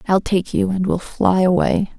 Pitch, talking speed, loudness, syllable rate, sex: 185 Hz, 210 wpm, -18 LUFS, 4.5 syllables/s, female